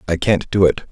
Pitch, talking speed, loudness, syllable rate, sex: 90 Hz, 265 wpm, -17 LUFS, 6.0 syllables/s, male